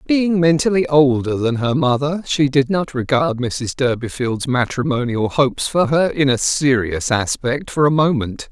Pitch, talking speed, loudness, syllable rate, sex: 135 Hz, 160 wpm, -17 LUFS, 4.5 syllables/s, male